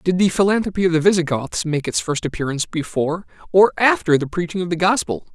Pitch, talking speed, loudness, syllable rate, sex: 175 Hz, 200 wpm, -19 LUFS, 6.2 syllables/s, male